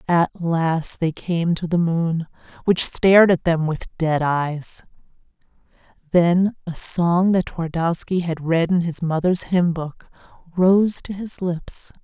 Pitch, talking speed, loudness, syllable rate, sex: 170 Hz, 150 wpm, -20 LUFS, 3.6 syllables/s, female